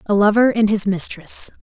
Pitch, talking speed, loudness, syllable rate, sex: 205 Hz, 185 wpm, -16 LUFS, 5.0 syllables/s, female